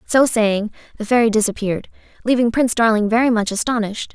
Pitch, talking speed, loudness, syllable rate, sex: 225 Hz, 160 wpm, -18 LUFS, 6.4 syllables/s, female